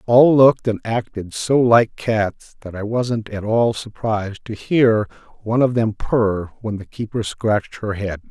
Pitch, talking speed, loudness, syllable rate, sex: 110 Hz, 180 wpm, -19 LUFS, 4.2 syllables/s, male